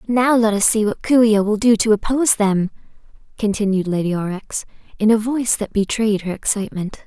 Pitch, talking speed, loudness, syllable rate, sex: 215 Hz, 195 wpm, -18 LUFS, 5.8 syllables/s, female